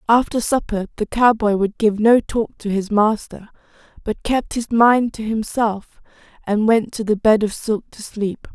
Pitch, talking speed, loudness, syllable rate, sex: 220 Hz, 180 wpm, -18 LUFS, 4.3 syllables/s, female